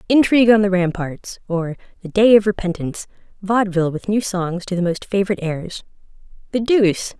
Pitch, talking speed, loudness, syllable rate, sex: 195 Hz, 165 wpm, -18 LUFS, 5.9 syllables/s, female